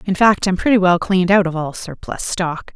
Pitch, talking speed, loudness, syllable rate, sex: 185 Hz, 240 wpm, -17 LUFS, 5.3 syllables/s, female